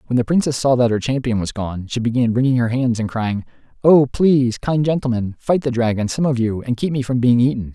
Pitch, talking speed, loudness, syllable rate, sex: 125 Hz, 250 wpm, -18 LUFS, 5.8 syllables/s, male